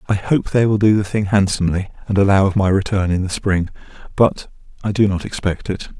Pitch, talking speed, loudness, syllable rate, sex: 100 Hz, 220 wpm, -18 LUFS, 5.9 syllables/s, male